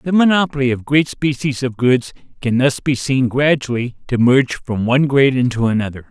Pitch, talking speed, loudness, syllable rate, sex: 130 Hz, 185 wpm, -16 LUFS, 5.4 syllables/s, male